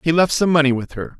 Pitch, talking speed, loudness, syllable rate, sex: 145 Hz, 305 wpm, -17 LUFS, 6.4 syllables/s, male